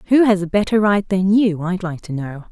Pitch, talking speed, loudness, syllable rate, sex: 190 Hz, 260 wpm, -18 LUFS, 5.3 syllables/s, female